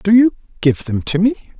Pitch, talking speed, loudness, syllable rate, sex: 190 Hz, 225 wpm, -16 LUFS, 4.8 syllables/s, male